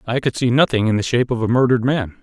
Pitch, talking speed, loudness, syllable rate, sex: 120 Hz, 295 wpm, -17 LUFS, 7.3 syllables/s, male